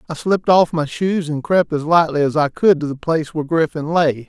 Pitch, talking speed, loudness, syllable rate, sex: 160 Hz, 250 wpm, -17 LUFS, 5.6 syllables/s, male